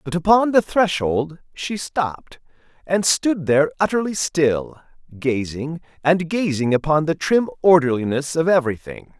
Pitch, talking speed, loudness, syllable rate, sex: 160 Hz, 130 wpm, -19 LUFS, 4.5 syllables/s, male